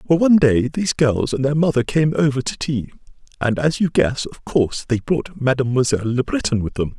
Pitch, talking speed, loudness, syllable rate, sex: 135 Hz, 215 wpm, -19 LUFS, 5.7 syllables/s, male